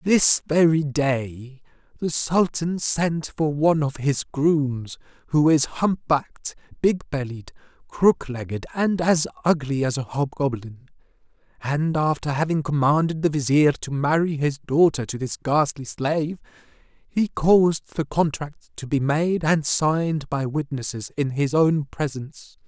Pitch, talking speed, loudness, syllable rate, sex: 150 Hz, 145 wpm, -22 LUFS, 4.1 syllables/s, male